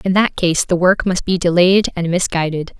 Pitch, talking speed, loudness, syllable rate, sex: 180 Hz, 215 wpm, -16 LUFS, 4.9 syllables/s, female